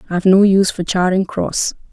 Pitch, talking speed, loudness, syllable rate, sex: 185 Hz, 190 wpm, -15 LUFS, 5.7 syllables/s, female